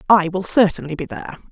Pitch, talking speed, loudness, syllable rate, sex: 175 Hz, 200 wpm, -18 LUFS, 6.5 syllables/s, female